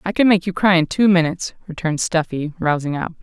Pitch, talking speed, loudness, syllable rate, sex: 170 Hz, 225 wpm, -18 LUFS, 6.3 syllables/s, female